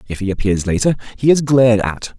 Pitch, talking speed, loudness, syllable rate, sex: 115 Hz, 220 wpm, -16 LUFS, 6.0 syllables/s, male